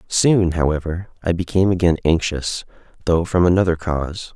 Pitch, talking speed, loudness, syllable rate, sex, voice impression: 85 Hz, 140 wpm, -19 LUFS, 5.3 syllables/s, male, masculine, adult-like, relaxed, weak, slightly dark, slightly muffled, slightly cool, sincere, calm, slightly friendly, kind, modest